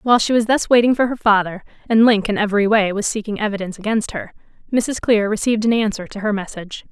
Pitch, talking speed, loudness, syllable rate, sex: 215 Hz, 225 wpm, -18 LUFS, 6.7 syllables/s, female